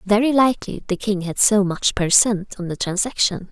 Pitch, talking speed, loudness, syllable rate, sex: 205 Hz, 205 wpm, -19 LUFS, 5.0 syllables/s, female